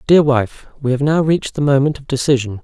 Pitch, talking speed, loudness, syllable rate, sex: 140 Hz, 205 wpm, -16 LUFS, 6.0 syllables/s, male